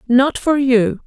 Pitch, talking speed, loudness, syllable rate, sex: 255 Hz, 170 wpm, -15 LUFS, 3.5 syllables/s, female